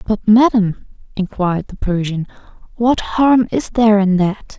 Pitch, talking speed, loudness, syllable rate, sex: 210 Hz, 145 wpm, -16 LUFS, 4.4 syllables/s, female